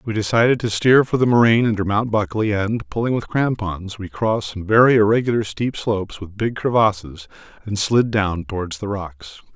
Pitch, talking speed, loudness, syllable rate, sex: 105 Hz, 190 wpm, -19 LUFS, 5.3 syllables/s, male